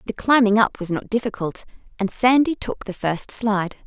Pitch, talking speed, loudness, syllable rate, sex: 215 Hz, 185 wpm, -21 LUFS, 5.2 syllables/s, female